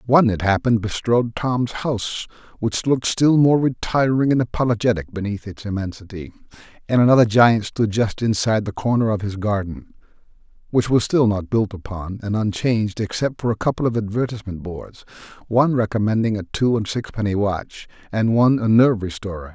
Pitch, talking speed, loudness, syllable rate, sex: 110 Hz, 165 wpm, -20 LUFS, 5.6 syllables/s, male